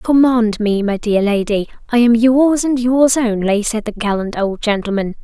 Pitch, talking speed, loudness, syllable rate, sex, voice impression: 225 Hz, 170 wpm, -15 LUFS, 4.5 syllables/s, female, feminine, slightly adult-like, fluent, slightly sincere, slightly unique, slightly kind